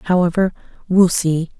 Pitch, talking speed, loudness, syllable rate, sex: 175 Hz, 115 wpm, -17 LUFS, 4.4 syllables/s, female